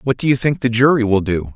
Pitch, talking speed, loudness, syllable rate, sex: 120 Hz, 310 wpm, -16 LUFS, 6.0 syllables/s, male